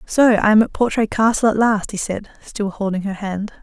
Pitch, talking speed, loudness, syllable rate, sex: 210 Hz, 230 wpm, -18 LUFS, 5.2 syllables/s, female